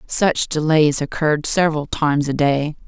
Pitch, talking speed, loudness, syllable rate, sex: 150 Hz, 145 wpm, -18 LUFS, 4.9 syllables/s, female